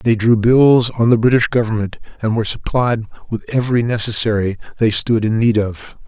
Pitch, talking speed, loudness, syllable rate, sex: 115 Hz, 180 wpm, -16 LUFS, 5.4 syllables/s, male